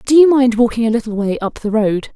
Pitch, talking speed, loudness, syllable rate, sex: 230 Hz, 280 wpm, -15 LUFS, 6.0 syllables/s, female